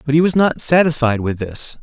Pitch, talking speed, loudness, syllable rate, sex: 140 Hz, 230 wpm, -16 LUFS, 5.3 syllables/s, male